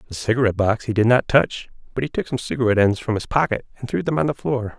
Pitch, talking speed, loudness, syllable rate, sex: 120 Hz, 275 wpm, -21 LUFS, 6.9 syllables/s, male